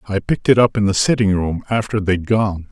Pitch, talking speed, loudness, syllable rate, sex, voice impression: 100 Hz, 245 wpm, -17 LUFS, 5.8 syllables/s, male, masculine, slightly old, thick, cool, slightly intellectual, calm, slightly wild